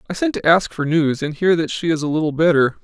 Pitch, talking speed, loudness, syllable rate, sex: 150 Hz, 295 wpm, -18 LUFS, 6.3 syllables/s, male